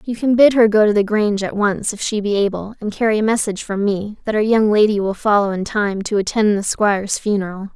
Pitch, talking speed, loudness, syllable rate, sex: 210 Hz, 255 wpm, -17 LUFS, 5.9 syllables/s, female